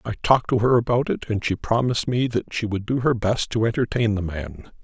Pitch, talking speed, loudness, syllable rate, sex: 115 Hz, 250 wpm, -22 LUFS, 5.7 syllables/s, male